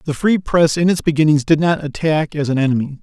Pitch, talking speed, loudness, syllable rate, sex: 155 Hz, 240 wpm, -16 LUFS, 5.9 syllables/s, male